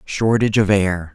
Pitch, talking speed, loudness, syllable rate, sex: 100 Hz, 155 wpm, -17 LUFS, 4.8 syllables/s, male